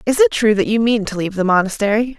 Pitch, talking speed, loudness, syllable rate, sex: 215 Hz, 275 wpm, -16 LUFS, 6.8 syllables/s, female